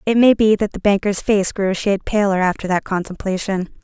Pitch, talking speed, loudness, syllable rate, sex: 200 Hz, 220 wpm, -18 LUFS, 5.8 syllables/s, female